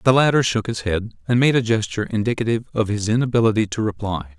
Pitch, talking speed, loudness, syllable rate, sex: 110 Hz, 205 wpm, -20 LUFS, 6.6 syllables/s, male